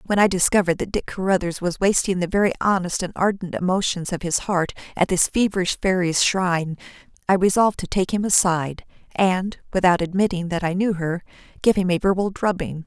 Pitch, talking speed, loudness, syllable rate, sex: 185 Hz, 185 wpm, -21 LUFS, 5.8 syllables/s, female